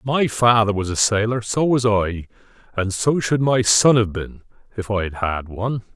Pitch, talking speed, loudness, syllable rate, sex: 110 Hz, 200 wpm, -19 LUFS, 4.8 syllables/s, male